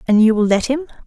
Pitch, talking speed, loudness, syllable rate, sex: 235 Hz, 280 wpm, -16 LUFS, 6.8 syllables/s, female